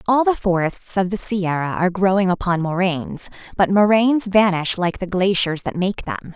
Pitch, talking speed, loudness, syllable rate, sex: 190 Hz, 180 wpm, -19 LUFS, 5.2 syllables/s, female